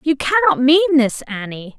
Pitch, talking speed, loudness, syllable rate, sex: 270 Hz, 170 wpm, -15 LUFS, 4.1 syllables/s, female